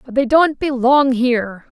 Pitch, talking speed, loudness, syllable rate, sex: 255 Hz, 170 wpm, -15 LUFS, 4.3 syllables/s, female